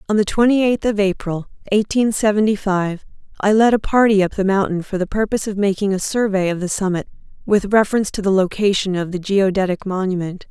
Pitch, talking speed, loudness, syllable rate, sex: 200 Hz, 200 wpm, -18 LUFS, 5.7 syllables/s, female